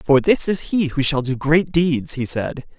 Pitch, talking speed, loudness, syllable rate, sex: 150 Hz, 235 wpm, -19 LUFS, 4.3 syllables/s, male